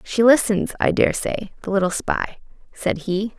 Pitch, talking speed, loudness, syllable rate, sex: 205 Hz, 175 wpm, -21 LUFS, 4.3 syllables/s, female